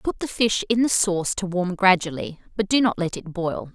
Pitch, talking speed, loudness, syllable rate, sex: 195 Hz, 240 wpm, -22 LUFS, 5.1 syllables/s, female